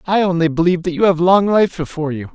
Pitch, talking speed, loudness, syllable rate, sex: 175 Hz, 255 wpm, -16 LUFS, 6.8 syllables/s, male